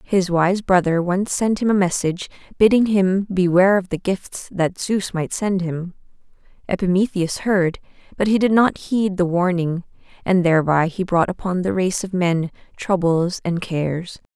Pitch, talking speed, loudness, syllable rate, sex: 185 Hz, 165 wpm, -19 LUFS, 4.6 syllables/s, female